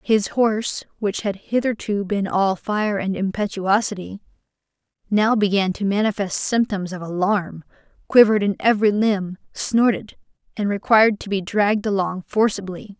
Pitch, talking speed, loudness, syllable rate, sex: 200 Hz, 135 wpm, -20 LUFS, 4.8 syllables/s, female